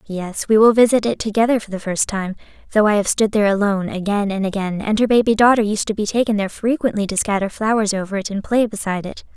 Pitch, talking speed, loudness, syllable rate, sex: 210 Hz, 245 wpm, -18 LUFS, 6.5 syllables/s, female